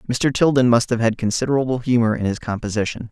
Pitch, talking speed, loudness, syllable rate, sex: 120 Hz, 195 wpm, -19 LUFS, 6.6 syllables/s, male